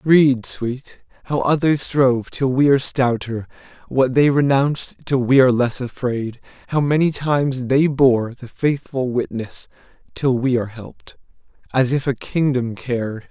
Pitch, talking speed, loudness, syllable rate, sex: 130 Hz, 155 wpm, -19 LUFS, 4.5 syllables/s, male